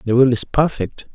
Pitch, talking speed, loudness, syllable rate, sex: 125 Hz, 210 wpm, -18 LUFS, 5.1 syllables/s, male